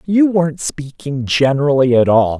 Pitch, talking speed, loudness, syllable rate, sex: 145 Hz, 150 wpm, -15 LUFS, 4.8 syllables/s, male